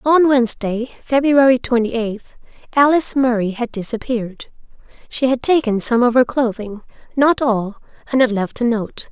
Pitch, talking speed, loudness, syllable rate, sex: 240 Hz, 145 wpm, -17 LUFS, 4.9 syllables/s, female